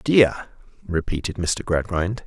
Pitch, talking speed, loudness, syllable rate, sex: 90 Hz, 105 wpm, -22 LUFS, 3.7 syllables/s, male